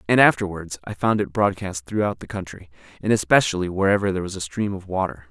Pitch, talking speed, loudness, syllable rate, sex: 95 Hz, 205 wpm, -22 LUFS, 6.3 syllables/s, male